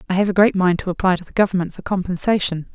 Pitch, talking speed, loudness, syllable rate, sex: 185 Hz, 260 wpm, -19 LUFS, 7.1 syllables/s, female